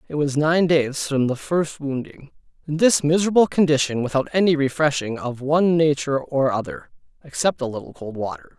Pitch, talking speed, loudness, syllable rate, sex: 150 Hz, 175 wpm, -21 LUFS, 5.5 syllables/s, male